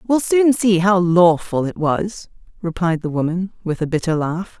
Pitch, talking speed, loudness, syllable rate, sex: 180 Hz, 185 wpm, -18 LUFS, 4.4 syllables/s, female